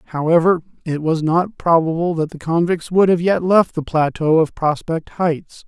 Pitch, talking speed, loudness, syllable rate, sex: 165 Hz, 180 wpm, -17 LUFS, 4.6 syllables/s, male